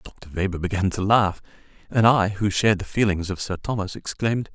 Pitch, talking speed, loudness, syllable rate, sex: 100 Hz, 200 wpm, -22 LUFS, 5.6 syllables/s, male